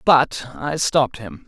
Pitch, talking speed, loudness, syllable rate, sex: 130 Hz, 160 wpm, -20 LUFS, 3.8 syllables/s, male